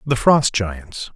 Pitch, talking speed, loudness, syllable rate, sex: 115 Hz, 155 wpm, -17 LUFS, 3.0 syllables/s, male